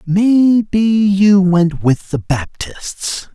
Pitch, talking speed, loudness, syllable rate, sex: 185 Hz, 125 wpm, -14 LUFS, 3.2 syllables/s, male